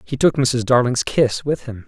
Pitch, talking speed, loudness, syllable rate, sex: 125 Hz, 225 wpm, -18 LUFS, 4.6 syllables/s, male